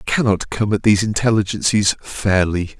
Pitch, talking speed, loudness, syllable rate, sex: 105 Hz, 150 wpm, -17 LUFS, 5.3 syllables/s, male